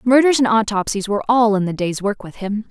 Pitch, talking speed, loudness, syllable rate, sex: 215 Hz, 245 wpm, -18 LUFS, 5.9 syllables/s, female